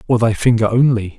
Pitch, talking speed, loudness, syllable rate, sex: 115 Hz, 205 wpm, -15 LUFS, 5.7 syllables/s, male